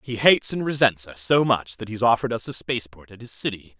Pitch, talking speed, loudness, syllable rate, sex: 120 Hz, 255 wpm, -22 LUFS, 6.3 syllables/s, male